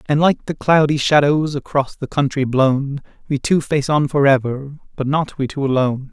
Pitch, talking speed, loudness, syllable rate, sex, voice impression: 140 Hz, 195 wpm, -17 LUFS, 4.9 syllables/s, male, masculine, adult-like, slightly clear, refreshing, sincere, slightly friendly